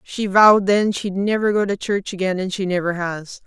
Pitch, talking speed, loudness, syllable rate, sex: 195 Hz, 225 wpm, -18 LUFS, 5.1 syllables/s, female